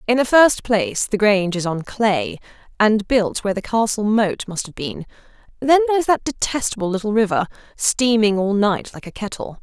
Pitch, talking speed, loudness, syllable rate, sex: 215 Hz, 185 wpm, -19 LUFS, 5.2 syllables/s, female